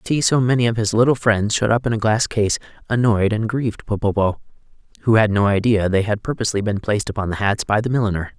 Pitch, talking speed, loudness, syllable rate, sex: 110 Hz, 235 wpm, -19 LUFS, 6.4 syllables/s, male